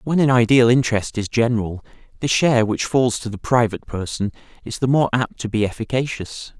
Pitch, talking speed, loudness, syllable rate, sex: 120 Hz, 190 wpm, -19 LUFS, 5.8 syllables/s, male